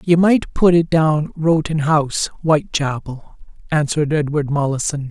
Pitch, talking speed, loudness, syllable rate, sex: 150 Hz, 130 wpm, -17 LUFS, 4.8 syllables/s, male